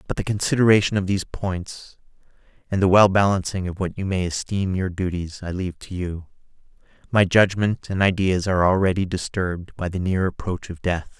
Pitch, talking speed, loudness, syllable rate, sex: 95 Hz, 180 wpm, -22 LUFS, 5.5 syllables/s, male